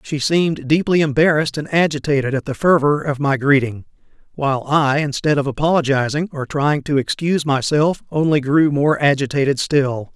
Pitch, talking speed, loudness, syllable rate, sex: 145 Hz, 160 wpm, -17 LUFS, 5.3 syllables/s, male